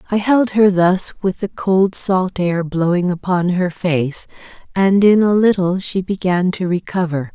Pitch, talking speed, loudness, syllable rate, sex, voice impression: 185 Hz, 170 wpm, -16 LUFS, 4.1 syllables/s, female, feminine, middle-aged, tensed, slightly powerful, soft, slightly muffled, intellectual, calm, slightly friendly, reassuring, elegant, slightly lively, slightly kind